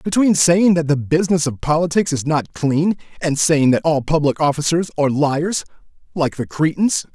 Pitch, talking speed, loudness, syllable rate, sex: 155 Hz, 175 wpm, -17 LUFS, 5.0 syllables/s, male